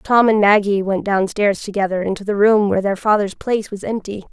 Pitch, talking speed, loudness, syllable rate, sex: 205 Hz, 210 wpm, -17 LUFS, 5.7 syllables/s, female